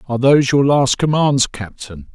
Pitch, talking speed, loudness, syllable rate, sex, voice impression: 130 Hz, 170 wpm, -15 LUFS, 5.1 syllables/s, male, masculine, very adult-like, slightly thick, cool, sincere, slightly kind